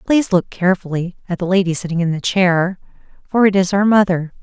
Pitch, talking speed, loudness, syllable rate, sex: 185 Hz, 205 wpm, -17 LUFS, 5.9 syllables/s, female